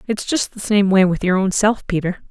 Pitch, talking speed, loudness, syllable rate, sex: 200 Hz, 260 wpm, -17 LUFS, 5.2 syllables/s, female